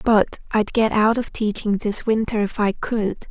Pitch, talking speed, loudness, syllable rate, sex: 215 Hz, 200 wpm, -21 LUFS, 4.4 syllables/s, female